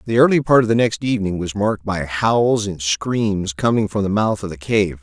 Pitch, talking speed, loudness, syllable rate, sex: 110 Hz, 240 wpm, -18 LUFS, 5.1 syllables/s, male